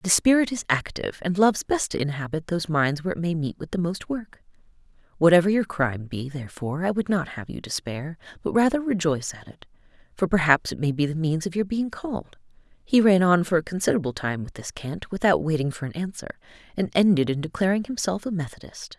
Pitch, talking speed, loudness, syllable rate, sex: 170 Hz, 215 wpm, -24 LUFS, 6.1 syllables/s, female